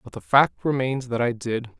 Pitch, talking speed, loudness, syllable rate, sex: 125 Hz, 235 wpm, -23 LUFS, 5.3 syllables/s, male